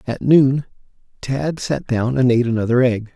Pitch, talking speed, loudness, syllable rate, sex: 125 Hz, 170 wpm, -18 LUFS, 4.9 syllables/s, male